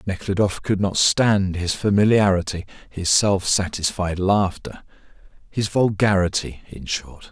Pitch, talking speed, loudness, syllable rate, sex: 95 Hz, 115 wpm, -20 LUFS, 4.2 syllables/s, male